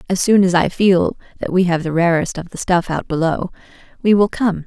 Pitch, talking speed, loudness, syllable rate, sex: 180 Hz, 230 wpm, -17 LUFS, 5.4 syllables/s, female